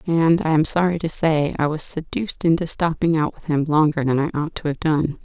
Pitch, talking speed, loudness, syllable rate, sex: 155 Hz, 240 wpm, -20 LUFS, 5.4 syllables/s, female